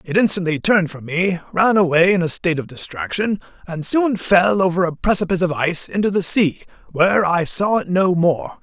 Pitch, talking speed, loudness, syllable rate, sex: 175 Hz, 200 wpm, -18 LUFS, 5.5 syllables/s, male